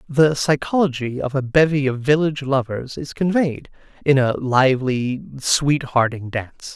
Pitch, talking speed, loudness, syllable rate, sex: 135 Hz, 140 wpm, -19 LUFS, 4.6 syllables/s, male